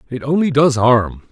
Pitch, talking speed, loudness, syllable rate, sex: 130 Hz, 185 wpm, -15 LUFS, 4.9 syllables/s, male